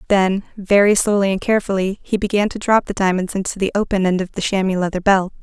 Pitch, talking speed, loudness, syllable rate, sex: 195 Hz, 220 wpm, -18 LUFS, 6.2 syllables/s, female